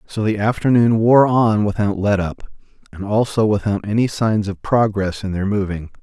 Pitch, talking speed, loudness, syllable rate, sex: 105 Hz, 160 wpm, -18 LUFS, 5.0 syllables/s, male